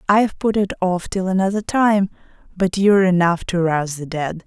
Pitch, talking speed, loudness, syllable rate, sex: 185 Hz, 190 wpm, -19 LUFS, 5.3 syllables/s, female